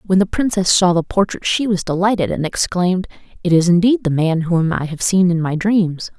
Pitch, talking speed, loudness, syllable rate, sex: 180 Hz, 225 wpm, -16 LUFS, 5.3 syllables/s, female